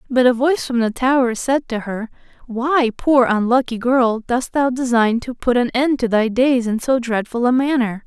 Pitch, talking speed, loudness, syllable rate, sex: 245 Hz, 210 wpm, -18 LUFS, 4.8 syllables/s, female